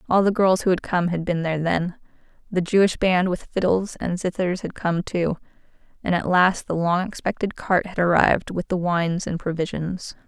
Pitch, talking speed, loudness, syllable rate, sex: 180 Hz, 200 wpm, -22 LUFS, 5.1 syllables/s, female